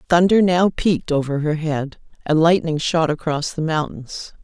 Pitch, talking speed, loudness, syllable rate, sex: 160 Hz, 160 wpm, -19 LUFS, 4.7 syllables/s, female